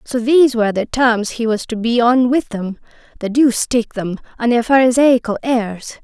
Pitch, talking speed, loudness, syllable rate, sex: 235 Hz, 190 wpm, -16 LUFS, 5.0 syllables/s, female